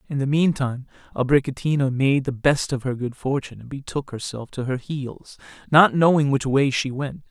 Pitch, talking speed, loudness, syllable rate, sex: 135 Hz, 190 wpm, -22 LUFS, 5.2 syllables/s, male